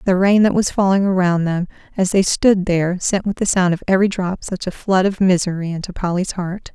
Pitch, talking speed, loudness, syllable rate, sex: 185 Hz, 230 wpm, -18 LUFS, 5.6 syllables/s, female